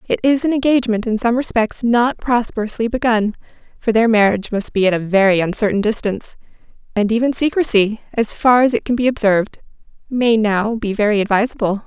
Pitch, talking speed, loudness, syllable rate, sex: 225 Hz, 175 wpm, -17 LUFS, 5.9 syllables/s, female